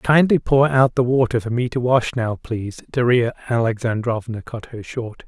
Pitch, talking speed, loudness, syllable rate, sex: 120 Hz, 180 wpm, -20 LUFS, 4.8 syllables/s, male